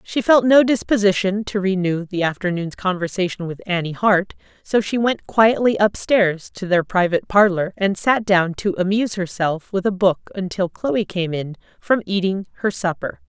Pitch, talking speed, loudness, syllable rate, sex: 195 Hz, 170 wpm, -19 LUFS, 4.8 syllables/s, female